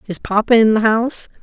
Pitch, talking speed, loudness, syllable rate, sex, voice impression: 220 Hz, 210 wpm, -15 LUFS, 5.9 syllables/s, female, feminine, slightly gender-neutral, very adult-like, middle-aged, thin, very tensed, slightly powerful, slightly dark, very hard, very clear, fluent, cool, very intellectual, very sincere, calm, friendly, reassuring, unique, elegant, slightly wild, sweet, slightly lively, strict, sharp